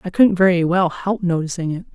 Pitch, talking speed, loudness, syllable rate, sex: 180 Hz, 215 wpm, -18 LUFS, 5.6 syllables/s, female